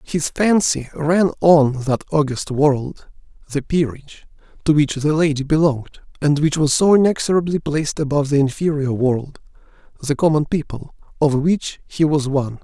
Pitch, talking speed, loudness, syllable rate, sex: 150 Hz, 150 wpm, -18 LUFS, 5.0 syllables/s, male